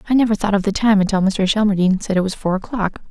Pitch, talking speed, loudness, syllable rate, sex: 200 Hz, 270 wpm, -18 LUFS, 7.1 syllables/s, female